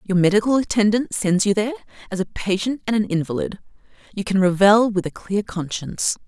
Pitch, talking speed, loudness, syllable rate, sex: 205 Hz, 180 wpm, -20 LUFS, 5.8 syllables/s, female